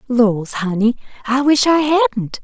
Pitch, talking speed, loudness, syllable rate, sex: 240 Hz, 150 wpm, -16 LUFS, 3.6 syllables/s, female